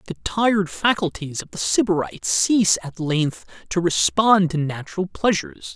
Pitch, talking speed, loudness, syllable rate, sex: 165 Hz, 145 wpm, -21 LUFS, 4.9 syllables/s, male